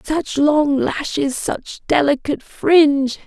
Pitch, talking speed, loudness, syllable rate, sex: 280 Hz, 110 wpm, -17 LUFS, 3.6 syllables/s, female